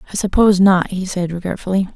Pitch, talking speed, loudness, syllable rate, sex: 190 Hz, 185 wpm, -16 LUFS, 6.5 syllables/s, female